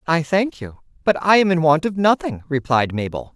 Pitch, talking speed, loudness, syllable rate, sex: 160 Hz, 215 wpm, -19 LUFS, 5.2 syllables/s, male